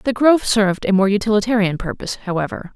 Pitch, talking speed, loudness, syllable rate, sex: 205 Hz, 175 wpm, -18 LUFS, 6.6 syllables/s, female